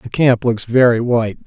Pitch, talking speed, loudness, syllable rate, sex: 120 Hz, 205 wpm, -15 LUFS, 5.2 syllables/s, male